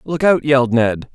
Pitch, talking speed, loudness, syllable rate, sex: 135 Hz, 210 wpm, -15 LUFS, 4.9 syllables/s, male